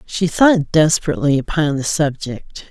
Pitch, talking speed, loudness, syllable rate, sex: 155 Hz, 135 wpm, -16 LUFS, 4.7 syllables/s, female